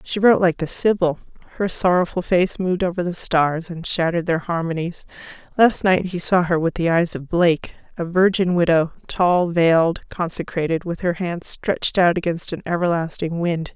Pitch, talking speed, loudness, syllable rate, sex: 175 Hz, 180 wpm, -20 LUFS, 5.1 syllables/s, female